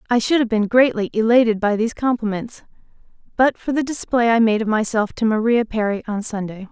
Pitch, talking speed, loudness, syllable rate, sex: 225 Hz, 195 wpm, -19 LUFS, 5.8 syllables/s, female